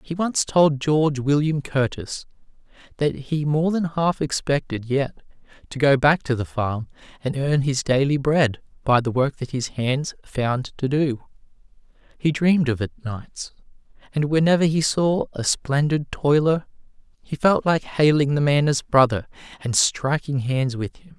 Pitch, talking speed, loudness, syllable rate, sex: 140 Hz, 165 wpm, -22 LUFS, 4.4 syllables/s, male